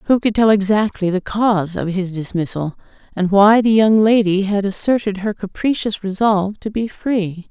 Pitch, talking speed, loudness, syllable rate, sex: 200 Hz, 175 wpm, -17 LUFS, 4.8 syllables/s, female